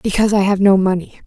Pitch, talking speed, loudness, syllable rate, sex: 195 Hz, 235 wpm, -15 LUFS, 6.7 syllables/s, female